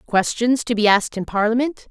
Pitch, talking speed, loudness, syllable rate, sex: 225 Hz, 190 wpm, -19 LUFS, 5.7 syllables/s, female